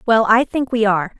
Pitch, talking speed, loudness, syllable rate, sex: 220 Hz, 250 wpm, -16 LUFS, 6.1 syllables/s, female